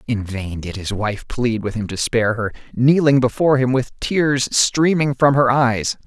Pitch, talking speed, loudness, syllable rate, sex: 125 Hz, 200 wpm, -18 LUFS, 4.4 syllables/s, male